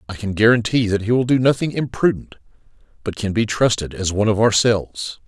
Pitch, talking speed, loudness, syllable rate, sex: 110 Hz, 195 wpm, -18 LUFS, 5.9 syllables/s, male